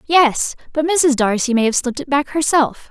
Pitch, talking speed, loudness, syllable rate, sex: 280 Hz, 205 wpm, -17 LUFS, 5.0 syllables/s, female